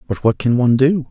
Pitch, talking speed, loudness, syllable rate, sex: 125 Hz, 270 wpm, -16 LUFS, 6.3 syllables/s, male